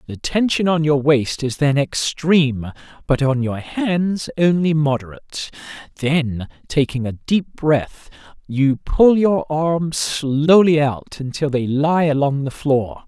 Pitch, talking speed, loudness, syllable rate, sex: 145 Hz, 140 wpm, -18 LUFS, 3.7 syllables/s, male